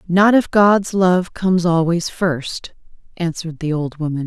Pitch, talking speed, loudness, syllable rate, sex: 175 Hz, 155 wpm, -17 LUFS, 4.3 syllables/s, female